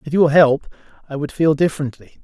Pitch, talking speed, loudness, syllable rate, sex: 145 Hz, 190 wpm, -17 LUFS, 5.7 syllables/s, male